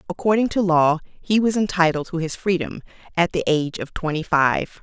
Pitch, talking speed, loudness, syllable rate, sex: 175 Hz, 185 wpm, -21 LUFS, 5.3 syllables/s, female